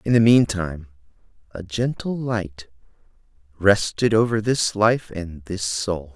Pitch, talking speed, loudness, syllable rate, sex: 100 Hz, 125 wpm, -21 LUFS, 4.0 syllables/s, male